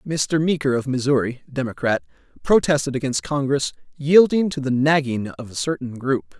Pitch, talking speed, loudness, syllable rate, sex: 140 Hz, 150 wpm, -21 LUFS, 5.1 syllables/s, male